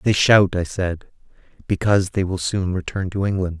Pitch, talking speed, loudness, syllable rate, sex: 95 Hz, 185 wpm, -20 LUFS, 5.1 syllables/s, male